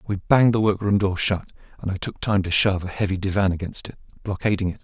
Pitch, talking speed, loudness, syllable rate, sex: 100 Hz, 235 wpm, -22 LUFS, 6.5 syllables/s, male